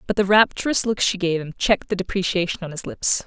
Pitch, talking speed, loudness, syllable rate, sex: 190 Hz, 240 wpm, -21 LUFS, 6.2 syllables/s, female